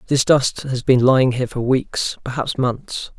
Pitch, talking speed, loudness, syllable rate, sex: 130 Hz, 190 wpm, -18 LUFS, 4.5 syllables/s, male